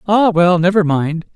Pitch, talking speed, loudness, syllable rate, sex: 180 Hz, 175 wpm, -14 LUFS, 4.4 syllables/s, male